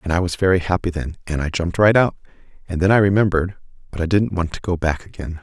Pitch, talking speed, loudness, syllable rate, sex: 90 Hz, 255 wpm, -19 LUFS, 6.8 syllables/s, male